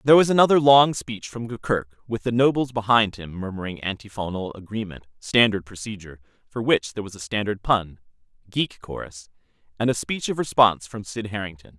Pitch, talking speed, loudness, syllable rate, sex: 110 Hz, 165 wpm, -23 LUFS, 5.7 syllables/s, male